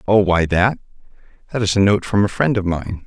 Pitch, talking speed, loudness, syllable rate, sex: 100 Hz, 215 wpm, -17 LUFS, 5.5 syllables/s, male